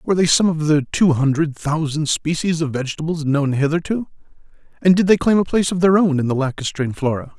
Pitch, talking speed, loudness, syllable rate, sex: 155 Hz, 210 wpm, -18 LUFS, 6.1 syllables/s, male